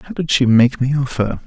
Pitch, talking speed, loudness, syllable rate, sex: 130 Hz, 245 wpm, -16 LUFS, 5.0 syllables/s, male